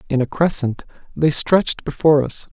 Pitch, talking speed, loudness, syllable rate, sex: 145 Hz, 160 wpm, -18 LUFS, 5.4 syllables/s, male